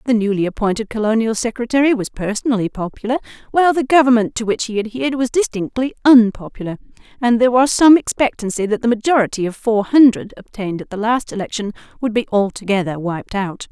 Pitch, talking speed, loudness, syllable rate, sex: 225 Hz, 170 wpm, -17 LUFS, 6.3 syllables/s, female